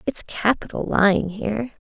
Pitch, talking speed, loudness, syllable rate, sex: 210 Hz, 130 wpm, -22 LUFS, 5.0 syllables/s, female